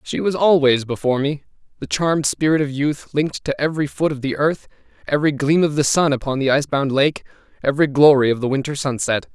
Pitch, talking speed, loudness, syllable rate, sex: 140 Hz, 205 wpm, -18 LUFS, 6.2 syllables/s, male